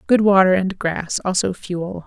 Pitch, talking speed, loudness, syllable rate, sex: 185 Hz, 175 wpm, -18 LUFS, 4.3 syllables/s, female